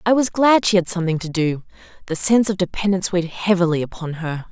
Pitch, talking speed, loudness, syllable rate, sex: 185 Hz, 215 wpm, -19 LUFS, 6.7 syllables/s, female